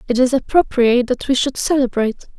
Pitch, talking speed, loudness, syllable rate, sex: 255 Hz, 175 wpm, -17 LUFS, 6.3 syllables/s, female